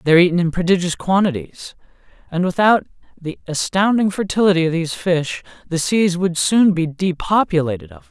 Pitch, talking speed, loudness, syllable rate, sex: 170 Hz, 155 wpm, -18 LUFS, 5.7 syllables/s, male